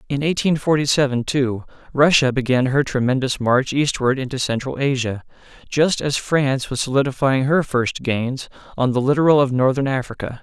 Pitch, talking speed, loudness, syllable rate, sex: 135 Hz, 160 wpm, -19 LUFS, 5.2 syllables/s, male